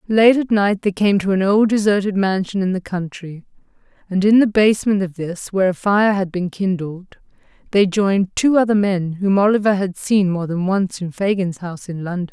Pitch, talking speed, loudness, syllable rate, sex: 195 Hz, 205 wpm, -18 LUFS, 5.2 syllables/s, female